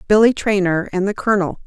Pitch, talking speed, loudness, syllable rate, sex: 195 Hz, 180 wpm, -17 LUFS, 6.1 syllables/s, female